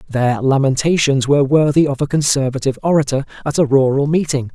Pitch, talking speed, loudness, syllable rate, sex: 140 Hz, 160 wpm, -15 LUFS, 6.0 syllables/s, male